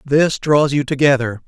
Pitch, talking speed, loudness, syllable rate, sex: 140 Hz, 165 wpm, -16 LUFS, 4.4 syllables/s, male